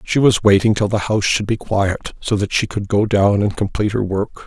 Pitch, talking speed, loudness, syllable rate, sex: 105 Hz, 255 wpm, -17 LUFS, 5.6 syllables/s, male